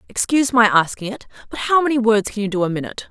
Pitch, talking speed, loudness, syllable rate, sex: 220 Hz, 250 wpm, -18 LUFS, 7.0 syllables/s, female